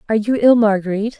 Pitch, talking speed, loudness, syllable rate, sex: 220 Hz, 200 wpm, -15 LUFS, 8.2 syllables/s, female